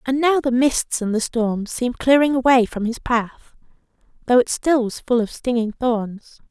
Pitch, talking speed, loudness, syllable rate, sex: 245 Hz, 195 wpm, -19 LUFS, 4.5 syllables/s, female